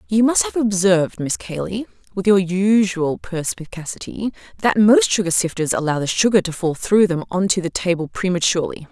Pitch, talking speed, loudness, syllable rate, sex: 190 Hz, 160 wpm, -19 LUFS, 5.3 syllables/s, female